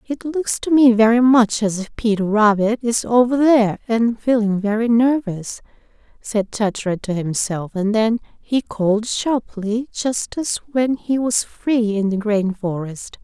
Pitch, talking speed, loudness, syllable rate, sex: 225 Hz, 165 wpm, -18 LUFS, 4.2 syllables/s, female